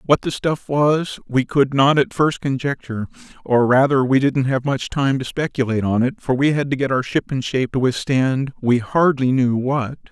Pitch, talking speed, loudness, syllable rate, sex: 135 Hz, 215 wpm, -19 LUFS, 5.0 syllables/s, male